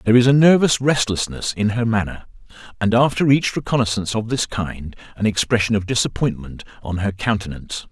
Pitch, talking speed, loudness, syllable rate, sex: 110 Hz, 165 wpm, -19 LUFS, 5.7 syllables/s, male